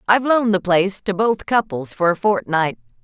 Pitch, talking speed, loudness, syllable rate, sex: 195 Hz, 200 wpm, -18 LUFS, 5.7 syllables/s, female